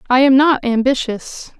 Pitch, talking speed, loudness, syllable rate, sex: 260 Hz, 150 wpm, -14 LUFS, 4.4 syllables/s, female